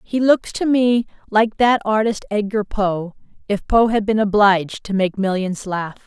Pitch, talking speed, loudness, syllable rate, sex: 210 Hz, 180 wpm, -18 LUFS, 4.4 syllables/s, female